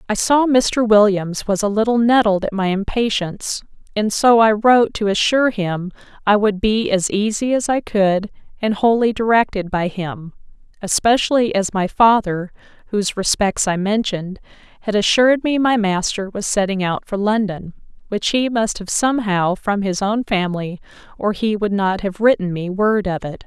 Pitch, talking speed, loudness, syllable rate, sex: 205 Hz, 175 wpm, -18 LUFS, 4.9 syllables/s, female